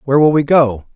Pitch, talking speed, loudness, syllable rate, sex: 135 Hz, 250 wpm, -13 LUFS, 6.3 syllables/s, male